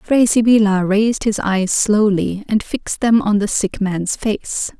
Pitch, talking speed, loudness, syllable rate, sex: 210 Hz, 175 wpm, -16 LUFS, 4.1 syllables/s, female